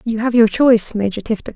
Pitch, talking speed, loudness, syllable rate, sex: 225 Hz, 230 wpm, -15 LUFS, 6.2 syllables/s, female